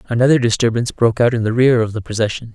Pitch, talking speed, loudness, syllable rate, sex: 115 Hz, 235 wpm, -16 LUFS, 7.6 syllables/s, male